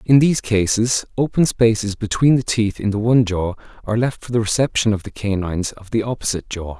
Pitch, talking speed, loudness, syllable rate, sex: 110 Hz, 210 wpm, -19 LUFS, 6.0 syllables/s, male